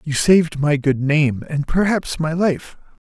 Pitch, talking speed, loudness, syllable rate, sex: 155 Hz, 175 wpm, -18 LUFS, 4.1 syllables/s, male